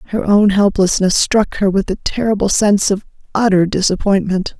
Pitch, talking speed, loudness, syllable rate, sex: 200 Hz, 155 wpm, -15 LUFS, 5.2 syllables/s, female